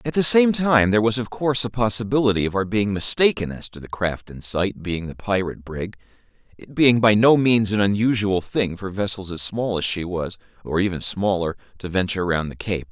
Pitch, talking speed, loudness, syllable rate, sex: 105 Hz, 220 wpm, -21 LUFS, 5.5 syllables/s, male